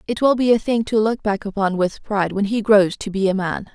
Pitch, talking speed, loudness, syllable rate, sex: 210 Hz, 290 wpm, -19 LUFS, 5.6 syllables/s, female